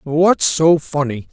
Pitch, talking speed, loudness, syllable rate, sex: 145 Hz, 135 wpm, -15 LUFS, 3.3 syllables/s, male